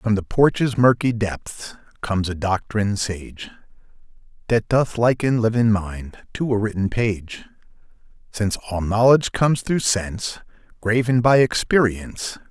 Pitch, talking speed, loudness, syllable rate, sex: 110 Hz, 130 wpm, -20 LUFS, 4.4 syllables/s, male